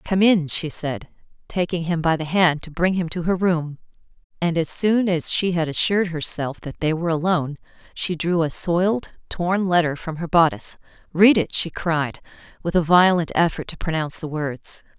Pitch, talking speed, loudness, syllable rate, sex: 170 Hz, 190 wpm, -21 LUFS, 5.1 syllables/s, female